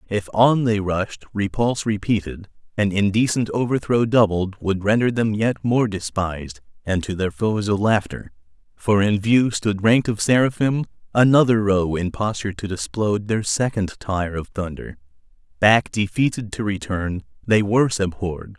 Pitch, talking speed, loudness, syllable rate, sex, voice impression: 105 Hz, 150 wpm, -20 LUFS, 4.5 syllables/s, male, masculine, adult-like, tensed, slightly powerful, clear, fluent, cool, intellectual, calm, friendly, wild, lively, kind